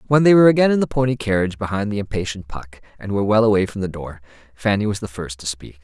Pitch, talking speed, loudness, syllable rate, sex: 105 Hz, 255 wpm, -19 LUFS, 7.0 syllables/s, male